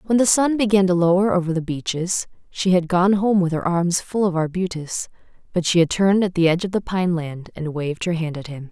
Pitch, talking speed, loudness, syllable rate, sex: 180 Hz, 240 wpm, -20 LUFS, 5.9 syllables/s, female